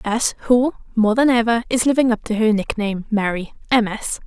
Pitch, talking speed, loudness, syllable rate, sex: 225 Hz, 170 wpm, -19 LUFS, 5.4 syllables/s, female